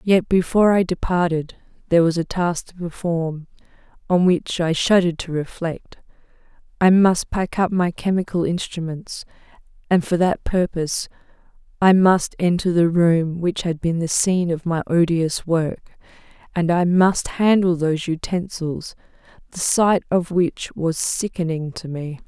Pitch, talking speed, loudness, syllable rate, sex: 170 Hz, 150 wpm, -20 LUFS, 4.5 syllables/s, female